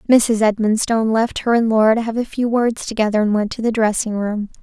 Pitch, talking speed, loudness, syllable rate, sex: 220 Hz, 235 wpm, -17 LUFS, 5.8 syllables/s, female